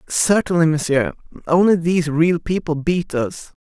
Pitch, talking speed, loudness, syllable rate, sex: 165 Hz, 130 wpm, -18 LUFS, 4.6 syllables/s, male